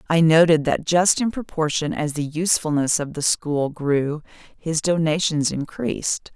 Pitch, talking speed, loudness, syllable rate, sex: 160 Hz, 150 wpm, -21 LUFS, 4.4 syllables/s, female